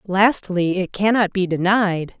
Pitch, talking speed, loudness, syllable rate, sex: 195 Hz, 165 wpm, -19 LUFS, 3.9 syllables/s, female